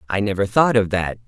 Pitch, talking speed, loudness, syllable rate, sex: 105 Hz, 235 wpm, -19 LUFS, 5.9 syllables/s, male